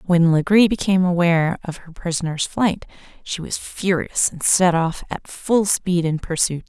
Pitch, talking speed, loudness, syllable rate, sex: 175 Hz, 170 wpm, -19 LUFS, 4.6 syllables/s, female